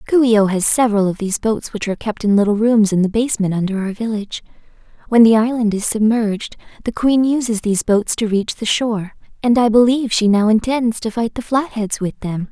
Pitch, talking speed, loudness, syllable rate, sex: 220 Hz, 220 wpm, -16 LUFS, 5.9 syllables/s, female